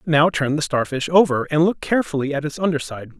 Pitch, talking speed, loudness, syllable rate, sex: 150 Hz, 205 wpm, -19 LUFS, 6.3 syllables/s, male